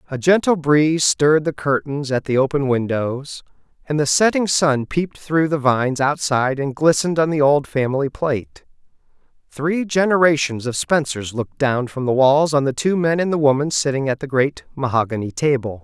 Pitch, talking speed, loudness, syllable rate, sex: 140 Hz, 180 wpm, -18 LUFS, 5.3 syllables/s, male